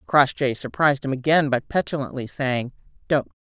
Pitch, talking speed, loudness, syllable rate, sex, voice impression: 135 Hz, 140 wpm, -22 LUFS, 5.2 syllables/s, female, slightly masculine, adult-like, slightly clear, slightly refreshing, unique